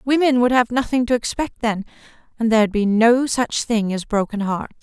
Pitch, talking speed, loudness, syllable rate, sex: 230 Hz, 200 wpm, -19 LUFS, 5.2 syllables/s, female